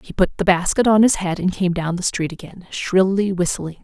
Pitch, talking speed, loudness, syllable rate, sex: 185 Hz, 235 wpm, -19 LUFS, 5.2 syllables/s, female